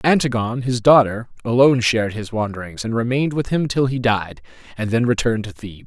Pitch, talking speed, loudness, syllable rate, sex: 120 Hz, 195 wpm, -19 LUFS, 6.3 syllables/s, male